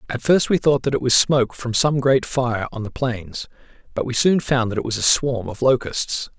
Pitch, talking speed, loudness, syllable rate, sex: 125 Hz, 245 wpm, -19 LUFS, 5.0 syllables/s, male